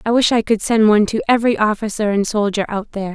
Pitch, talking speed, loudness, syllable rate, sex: 215 Hz, 250 wpm, -17 LUFS, 6.8 syllables/s, female